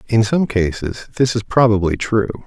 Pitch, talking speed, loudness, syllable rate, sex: 110 Hz, 170 wpm, -17 LUFS, 4.9 syllables/s, male